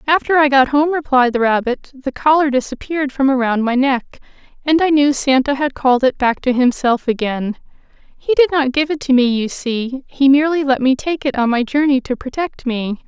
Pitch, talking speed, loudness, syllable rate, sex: 270 Hz, 210 wpm, -16 LUFS, 5.3 syllables/s, female